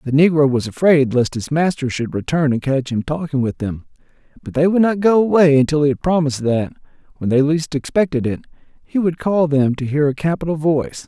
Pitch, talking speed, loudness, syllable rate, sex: 145 Hz, 215 wpm, -17 LUFS, 5.7 syllables/s, male